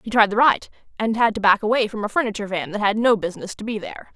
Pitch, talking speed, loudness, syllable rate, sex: 215 Hz, 290 wpm, -20 LUFS, 7.3 syllables/s, female